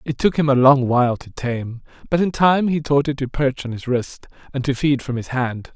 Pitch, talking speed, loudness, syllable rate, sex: 135 Hz, 260 wpm, -19 LUFS, 5.1 syllables/s, male